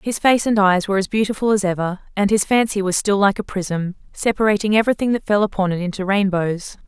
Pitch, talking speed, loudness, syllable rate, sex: 200 Hz, 220 wpm, -19 LUFS, 6.0 syllables/s, female